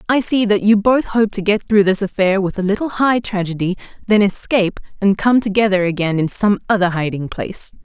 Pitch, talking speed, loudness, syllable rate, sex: 200 Hz, 205 wpm, -16 LUFS, 5.6 syllables/s, female